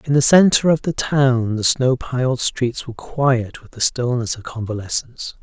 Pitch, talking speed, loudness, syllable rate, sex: 125 Hz, 190 wpm, -18 LUFS, 4.7 syllables/s, male